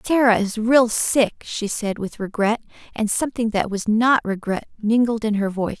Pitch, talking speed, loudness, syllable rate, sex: 220 Hz, 185 wpm, -20 LUFS, 4.8 syllables/s, female